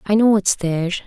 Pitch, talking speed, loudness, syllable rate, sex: 195 Hz, 225 wpm, -18 LUFS, 6.1 syllables/s, female